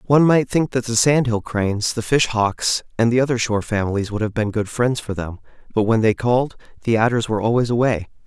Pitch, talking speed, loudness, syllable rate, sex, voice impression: 115 Hz, 230 wpm, -19 LUFS, 5.9 syllables/s, male, very masculine, slightly young, very adult-like, very thick, tensed, powerful, bright, slightly hard, slightly muffled, fluent, cool, intellectual, very refreshing, sincere, calm, slightly mature, slightly friendly, reassuring, slightly wild, slightly sweet, lively, slightly kind